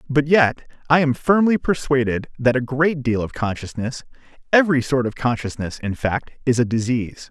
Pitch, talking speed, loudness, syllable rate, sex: 130 Hz, 175 wpm, -20 LUFS, 5.2 syllables/s, male